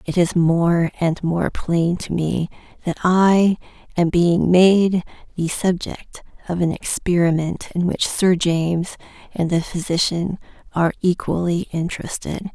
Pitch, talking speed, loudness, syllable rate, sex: 175 Hz, 135 wpm, -19 LUFS, 4.1 syllables/s, female